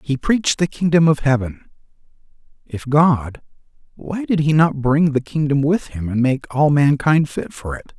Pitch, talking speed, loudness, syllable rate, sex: 145 Hz, 180 wpm, -18 LUFS, 4.5 syllables/s, male